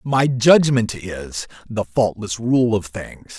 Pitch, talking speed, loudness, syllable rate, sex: 110 Hz, 140 wpm, -19 LUFS, 3.3 syllables/s, male